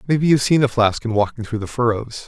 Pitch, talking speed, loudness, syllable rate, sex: 120 Hz, 265 wpm, -19 LUFS, 6.6 syllables/s, male